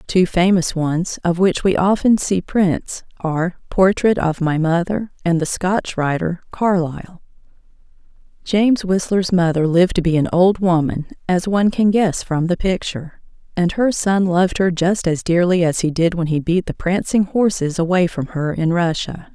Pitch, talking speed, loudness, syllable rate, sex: 180 Hz, 175 wpm, -18 LUFS, 4.7 syllables/s, female